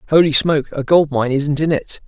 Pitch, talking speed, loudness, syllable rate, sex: 145 Hz, 230 wpm, -16 LUFS, 5.7 syllables/s, male